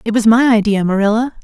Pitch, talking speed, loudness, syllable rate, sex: 220 Hz, 210 wpm, -13 LUFS, 6.4 syllables/s, female